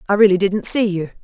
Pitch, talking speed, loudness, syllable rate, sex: 195 Hz, 245 wpm, -16 LUFS, 6.3 syllables/s, female